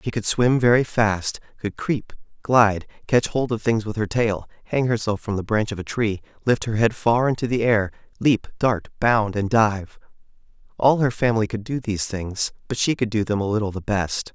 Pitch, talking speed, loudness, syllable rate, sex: 110 Hz, 215 wpm, -22 LUFS, 5.0 syllables/s, male